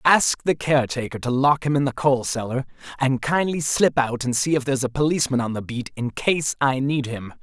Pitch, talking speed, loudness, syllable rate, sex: 135 Hz, 225 wpm, -22 LUFS, 5.4 syllables/s, male